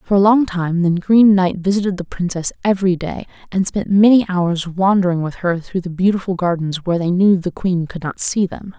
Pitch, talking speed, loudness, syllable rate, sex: 185 Hz, 220 wpm, -17 LUFS, 5.3 syllables/s, female